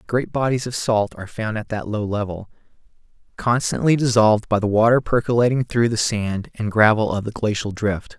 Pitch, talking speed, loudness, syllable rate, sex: 110 Hz, 185 wpm, -20 LUFS, 5.3 syllables/s, male